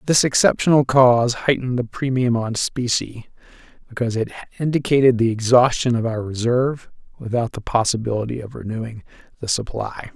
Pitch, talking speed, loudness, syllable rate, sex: 120 Hz, 135 wpm, -19 LUFS, 5.7 syllables/s, male